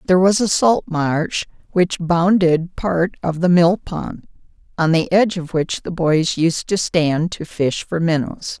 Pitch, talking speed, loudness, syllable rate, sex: 170 Hz, 180 wpm, -18 LUFS, 4.0 syllables/s, female